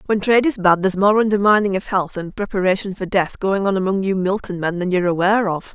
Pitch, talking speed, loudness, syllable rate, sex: 195 Hz, 240 wpm, -18 LUFS, 6.4 syllables/s, female